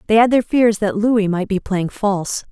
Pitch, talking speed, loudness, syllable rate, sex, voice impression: 205 Hz, 240 wpm, -17 LUFS, 5.2 syllables/s, female, feminine, adult-like, slightly middle-aged, thin, slightly tensed, slightly powerful, bright, hard, slightly clear, fluent, slightly cool, intellectual, slightly refreshing, sincere, calm, slightly friendly, reassuring, slightly unique, slightly elegant, slightly lively, slightly strict, slightly sharp